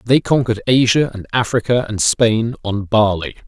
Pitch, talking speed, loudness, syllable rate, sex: 115 Hz, 155 wpm, -16 LUFS, 5.0 syllables/s, male